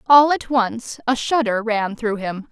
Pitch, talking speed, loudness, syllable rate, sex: 235 Hz, 190 wpm, -19 LUFS, 3.9 syllables/s, female